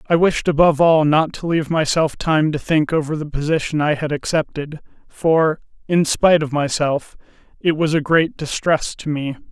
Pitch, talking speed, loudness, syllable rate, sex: 155 Hz, 185 wpm, -18 LUFS, 5.0 syllables/s, male